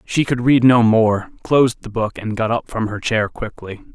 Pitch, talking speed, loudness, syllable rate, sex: 115 Hz, 230 wpm, -17 LUFS, 4.7 syllables/s, male